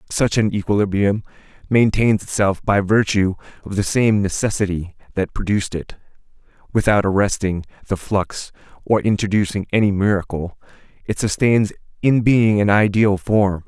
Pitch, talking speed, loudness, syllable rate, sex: 100 Hz, 125 wpm, -19 LUFS, 4.9 syllables/s, male